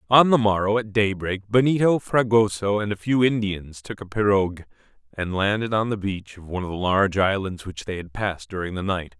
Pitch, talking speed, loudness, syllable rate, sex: 100 Hz, 210 wpm, -22 LUFS, 5.5 syllables/s, male